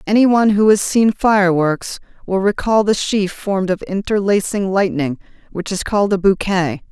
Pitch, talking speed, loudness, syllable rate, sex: 195 Hz, 165 wpm, -16 LUFS, 5.1 syllables/s, female